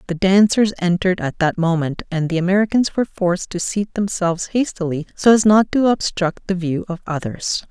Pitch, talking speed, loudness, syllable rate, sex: 185 Hz, 185 wpm, -18 LUFS, 5.4 syllables/s, female